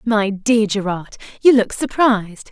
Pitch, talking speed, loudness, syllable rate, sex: 215 Hz, 145 wpm, -17 LUFS, 4.2 syllables/s, female